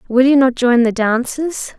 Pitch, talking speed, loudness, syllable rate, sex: 255 Hz, 200 wpm, -15 LUFS, 4.4 syllables/s, female